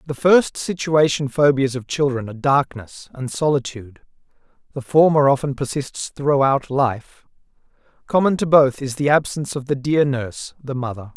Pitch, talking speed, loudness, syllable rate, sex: 140 Hz, 150 wpm, -19 LUFS, 4.9 syllables/s, male